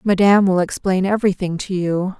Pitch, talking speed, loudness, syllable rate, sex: 190 Hz, 165 wpm, -17 LUFS, 5.7 syllables/s, female